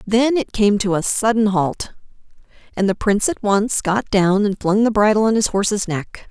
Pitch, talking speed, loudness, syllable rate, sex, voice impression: 210 Hz, 210 wpm, -18 LUFS, 4.9 syllables/s, female, very feminine, slightly adult-like, thin, tensed, powerful, very bright, soft, very clear, very fluent, slightly raspy, cute, very intellectual, very refreshing, sincere, slightly calm, very friendly, very reassuring, unique, slightly elegant, wild, sweet, very lively, kind, slightly intense, light